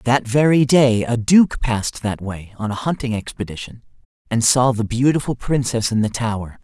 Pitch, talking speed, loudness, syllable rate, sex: 120 Hz, 180 wpm, -18 LUFS, 4.9 syllables/s, male